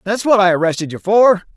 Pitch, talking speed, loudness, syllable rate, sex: 195 Hz, 230 wpm, -14 LUFS, 5.8 syllables/s, male